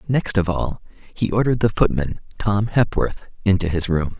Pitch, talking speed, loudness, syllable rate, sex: 100 Hz, 170 wpm, -21 LUFS, 4.8 syllables/s, male